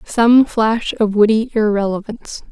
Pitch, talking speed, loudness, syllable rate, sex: 220 Hz, 120 wpm, -15 LUFS, 4.3 syllables/s, female